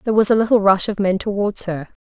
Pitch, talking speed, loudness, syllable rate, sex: 200 Hz, 265 wpm, -17 LUFS, 6.5 syllables/s, female